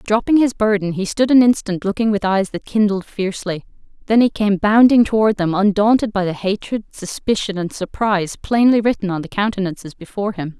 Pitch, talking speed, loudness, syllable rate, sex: 205 Hz, 185 wpm, -17 LUFS, 5.6 syllables/s, female